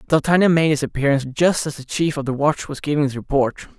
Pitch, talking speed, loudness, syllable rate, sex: 145 Hz, 240 wpm, -19 LUFS, 6.1 syllables/s, male